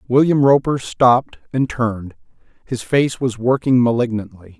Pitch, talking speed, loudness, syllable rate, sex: 125 Hz, 130 wpm, -17 LUFS, 4.7 syllables/s, male